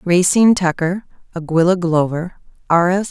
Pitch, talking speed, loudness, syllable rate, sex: 175 Hz, 115 wpm, -16 LUFS, 4.9 syllables/s, female